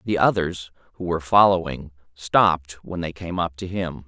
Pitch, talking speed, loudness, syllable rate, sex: 85 Hz, 175 wpm, -22 LUFS, 4.9 syllables/s, male